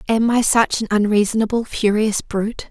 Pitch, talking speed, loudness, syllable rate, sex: 215 Hz, 155 wpm, -18 LUFS, 5.2 syllables/s, female